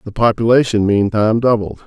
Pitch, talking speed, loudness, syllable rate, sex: 110 Hz, 130 wpm, -14 LUFS, 5.9 syllables/s, male